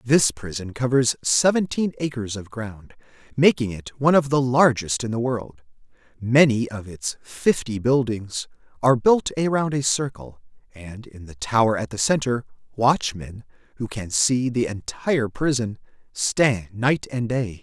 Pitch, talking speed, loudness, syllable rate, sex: 120 Hz, 150 wpm, -22 LUFS, 4.3 syllables/s, male